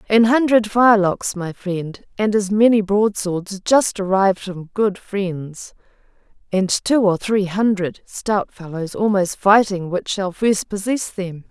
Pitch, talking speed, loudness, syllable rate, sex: 200 Hz, 145 wpm, -19 LUFS, 3.9 syllables/s, female